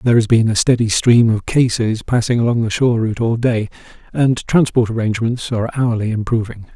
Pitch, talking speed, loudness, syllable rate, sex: 115 Hz, 185 wpm, -16 LUFS, 5.8 syllables/s, male